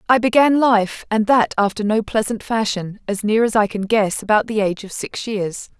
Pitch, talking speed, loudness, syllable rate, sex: 215 Hz, 215 wpm, -18 LUFS, 5.0 syllables/s, female